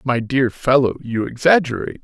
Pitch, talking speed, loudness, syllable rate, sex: 130 Hz, 145 wpm, -18 LUFS, 5.4 syllables/s, male